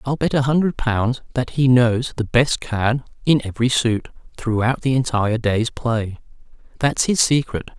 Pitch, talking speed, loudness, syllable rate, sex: 125 Hz, 170 wpm, -19 LUFS, 4.6 syllables/s, male